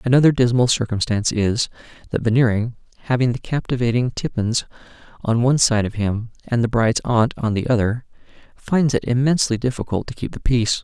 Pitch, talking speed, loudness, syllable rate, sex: 120 Hz, 165 wpm, -20 LUFS, 5.9 syllables/s, male